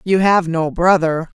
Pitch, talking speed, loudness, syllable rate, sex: 175 Hz, 175 wpm, -15 LUFS, 4.0 syllables/s, female